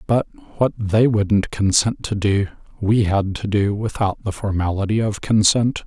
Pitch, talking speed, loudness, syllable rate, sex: 105 Hz, 165 wpm, -19 LUFS, 4.4 syllables/s, male